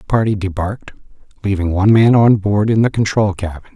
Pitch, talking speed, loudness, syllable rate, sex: 100 Hz, 190 wpm, -15 LUFS, 6.1 syllables/s, male